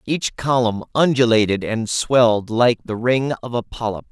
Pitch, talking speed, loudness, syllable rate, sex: 120 Hz, 160 wpm, -19 LUFS, 4.5 syllables/s, male